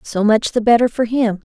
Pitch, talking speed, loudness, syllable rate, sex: 225 Hz, 240 wpm, -16 LUFS, 5.2 syllables/s, female